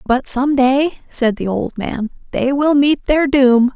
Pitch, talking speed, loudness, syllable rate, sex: 265 Hz, 175 wpm, -16 LUFS, 3.9 syllables/s, female